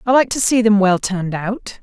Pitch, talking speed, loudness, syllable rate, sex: 210 Hz, 260 wpm, -16 LUFS, 5.3 syllables/s, female